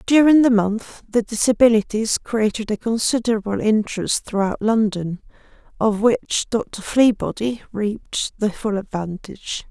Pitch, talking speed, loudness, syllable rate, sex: 220 Hz, 120 wpm, -20 LUFS, 4.6 syllables/s, female